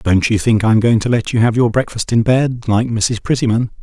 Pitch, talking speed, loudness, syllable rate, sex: 115 Hz, 265 wpm, -15 LUFS, 5.5 syllables/s, male